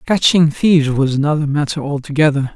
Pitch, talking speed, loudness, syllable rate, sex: 150 Hz, 140 wpm, -15 LUFS, 5.8 syllables/s, male